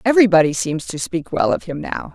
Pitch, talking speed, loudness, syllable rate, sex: 175 Hz, 225 wpm, -18 LUFS, 5.9 syllables/s, female